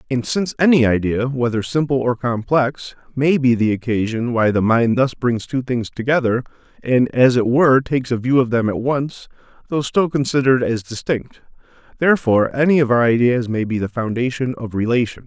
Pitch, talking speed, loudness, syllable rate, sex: 125 Hz, 185 wpm, -18 LUFS, 5.4 syllables/s, male